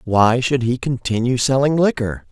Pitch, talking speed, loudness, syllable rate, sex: 125 Hz, 155 wpm, -18 LUFS, 4.6 syllables/s, male